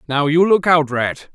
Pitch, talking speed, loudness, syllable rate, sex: 155 Hz, 225 wpm, -16 LUFS, 4.4 syllables/s, male